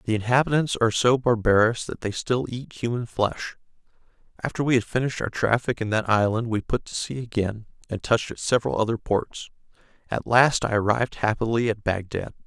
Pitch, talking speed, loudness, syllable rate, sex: 115 Hz, 185 wpm, -24 LUFS, 5.7 syllables/s, male